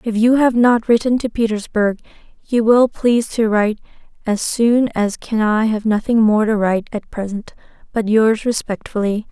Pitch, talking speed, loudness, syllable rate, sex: 220 Hz, 175 wpm, -17 LUFS, 4.8 syllables/s, female